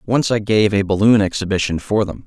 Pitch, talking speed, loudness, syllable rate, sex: 105 Hz, 210 wpm, -17 LUFS, 5.4 syllables/s, male